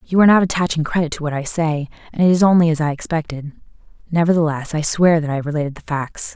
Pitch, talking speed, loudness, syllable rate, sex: 160 Hz, 235 wpm, -18 LUFS, 6.8 syllables/s, female